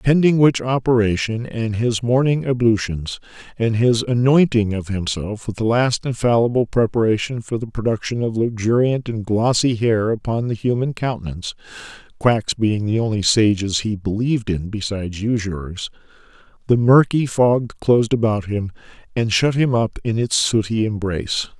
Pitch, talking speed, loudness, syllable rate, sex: 115 Hz, 145 wpm, -19 LUFS, 4.1 syllables/s, male